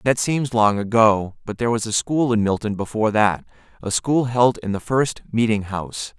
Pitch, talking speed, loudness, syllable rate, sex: 110 Hz, 205 wpm, -20 LUFS, 5.0 syllables/s, male